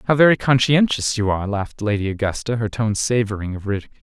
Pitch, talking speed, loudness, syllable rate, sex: 110 Hz, 190 wpm, -20 LUFS, 6.5 syllables/s, male